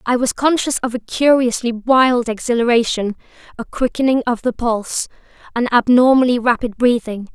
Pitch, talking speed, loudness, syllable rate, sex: 245 Hz, 140 wpm, -16 LUFS, 5.1 syllables/s, female